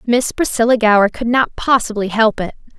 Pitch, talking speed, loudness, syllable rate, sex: 225 Hz, 175 wpm, -15 LUFS, 5.3 syllables/s, female